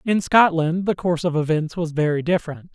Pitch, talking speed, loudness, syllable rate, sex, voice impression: 165 Hz, 195 wpm, -20 LUFS, 5.7 syllables/s, male, masculine, adult-like, tensed, bright, clear, slightly halting, intellectual, calm, friendly, reassuring, wild, lively, slightly strict, slightly sharp